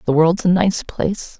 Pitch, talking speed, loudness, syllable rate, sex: 175 Hz, 215 wpm, -17 LUFS, 4.8 syllables/s, female